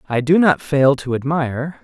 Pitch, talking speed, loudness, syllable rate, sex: 145 Hz, 195 wpm, -17 LUFS, 4.9 syllables/s, male